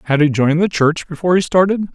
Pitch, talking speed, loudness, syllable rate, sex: 165 Hz, 245 wpm, -15 LUFS, 6.9 syllables/s, male